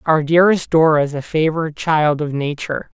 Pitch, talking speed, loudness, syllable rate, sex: 155 Hz, 180 wpm, -17 LUFS, 6.0 syllables/s, male